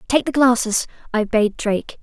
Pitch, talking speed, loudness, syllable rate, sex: 235 Hz, 180 wpm, -19 LUFS, 5.0 syllables/s, female